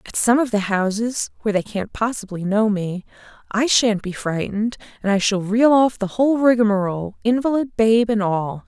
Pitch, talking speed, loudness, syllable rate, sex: 215 Hz, 175 wpm, -19 LUFS, 5.1 syllables/s, female